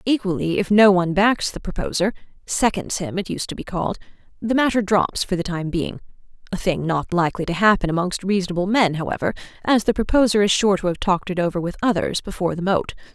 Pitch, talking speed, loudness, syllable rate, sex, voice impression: 190 Hz, 200 wpm, -21 LUFS, 6.2 syllables/s, female, feminine, adult-like, tensed, powerful, bright, clear, fluent, intellectual, calm, friendly, elegant, lively, kind